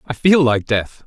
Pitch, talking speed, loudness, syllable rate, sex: 130 Hz, 225 wpm, -16 LUFS, 4.3 syllables/s, male